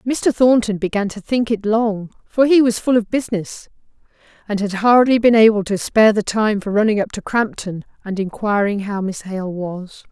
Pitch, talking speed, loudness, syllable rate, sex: 210 Hz, 195 wpm, -17 LUFS, 4.9 syllables/s, female